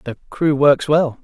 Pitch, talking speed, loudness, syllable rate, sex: 145 Hz, 195 wpm, -16 LUFS, 4.0 syllables/s, male